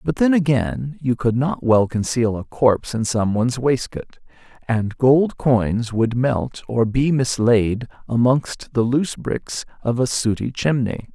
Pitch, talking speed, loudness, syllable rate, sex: 120 Hz, 155 wpm, -20 LUFS, 4.0 syllables/s, male